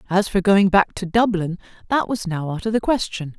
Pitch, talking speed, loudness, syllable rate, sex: 195 Hz, 230 wpm, -20 LUFS, 5.2 syllables/s, female